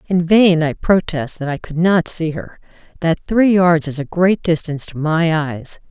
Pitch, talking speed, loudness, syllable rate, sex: 165 Hz, 195 wpm, -16 LUFS, 4.5 syllables/s, female